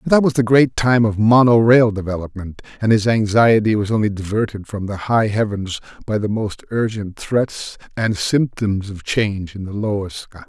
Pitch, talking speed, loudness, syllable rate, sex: 105 Hz, 190 wpm, -18 LUFS, 4.9 syllables/s, male